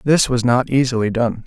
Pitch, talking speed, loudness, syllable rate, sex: 125 Hz, 205 wpm, -17 LUFS, 5.1 syllables/s, male